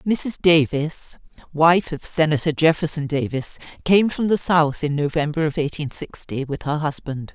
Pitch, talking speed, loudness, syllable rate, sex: 155 Hz, 155 wpm, -20 LUFS, 4.6 syllables/s, female